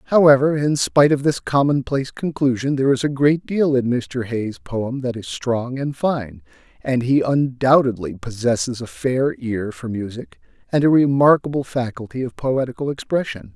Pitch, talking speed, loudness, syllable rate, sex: 130 Hz, 165 wpm, -19 LUFS, 4.8 syllables/s, male